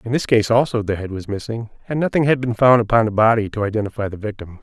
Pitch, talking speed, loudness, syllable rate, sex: 115 Hz, 260 wpm, -19 LUFS, 6.7 syllables/s, male